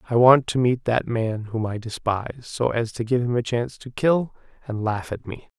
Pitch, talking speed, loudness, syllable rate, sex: 120 Hz, 235 wpm, -23 LUFS, 5.1 syllables/s, male